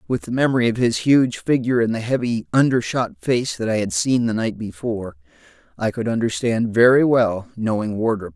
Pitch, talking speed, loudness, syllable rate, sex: 115 Hz, 195 wpm, -20 LUFS, 5.4 syllables/s, male